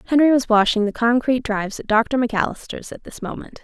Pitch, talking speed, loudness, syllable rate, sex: 235 Hz, 200 wpm, -19 LUFS, 6.5 syllables/s, female